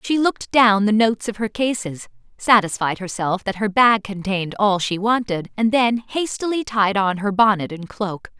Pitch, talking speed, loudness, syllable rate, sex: 210 Hz, 185 wpm, -19 LUFS, 4.8 syllables/s, female